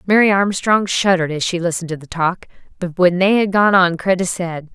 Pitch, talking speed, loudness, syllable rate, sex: 180 Hz, 215 wpm, -16 LUFS, 5.6 syllables/s, female